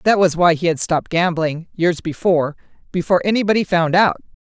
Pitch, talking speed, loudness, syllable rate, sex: 175 Hz, 175 wpm, -17 LUFS, 6.0 syllables/s, female